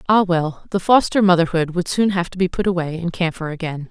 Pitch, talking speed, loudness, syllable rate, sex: 175 Hz, 230 wpm, -19 LUFS, 5.7 syllables/s, female